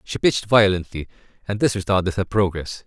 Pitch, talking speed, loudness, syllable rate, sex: 100 Hz, 165 wpm, -20 LUFS, 5.9 syllables/s, male